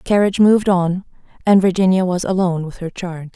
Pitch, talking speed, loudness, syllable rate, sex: 185 Hz, 195 wpm, -17 LUFS, 6.8 syllables/s, female